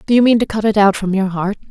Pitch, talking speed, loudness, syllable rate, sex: 205 Hz, 350 wpm, -15 LUFS, 6.7 syllables/s, female